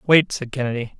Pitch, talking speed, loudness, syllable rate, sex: 130 Hz, 180 wpm, -21 LUFS, 5.4 syllables/s, male